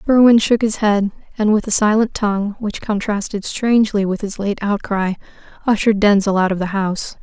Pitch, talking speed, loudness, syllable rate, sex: 205 Hz, 185 wpm, -17 LUFS, 5.4 syllables/s, female